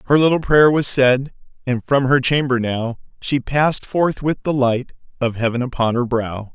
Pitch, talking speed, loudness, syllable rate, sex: 130 Hz, 190 wpm, -18 LUFS, 4.7 syllables/s, male